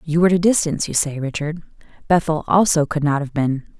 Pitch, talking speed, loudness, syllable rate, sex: 155 Hz, 220 wpm, -19 LUFS, 6.5 syllables/s, female